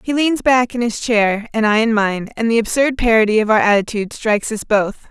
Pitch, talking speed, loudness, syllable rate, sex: 225 Hz, 235 wpm, -16 LUFS, 5.5 syllables/s, female